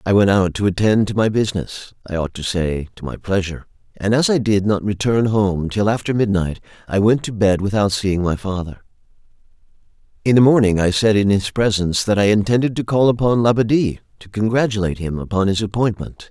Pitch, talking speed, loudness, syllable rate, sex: 105 Hz, 200 wpm, -18 LUFS, 5.3 syllables/s, male